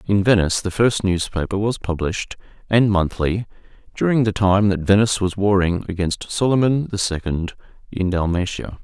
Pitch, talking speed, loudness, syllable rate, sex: 100 Hz, 150 wpm, -19 LUFS, 5.3 syllables/s, male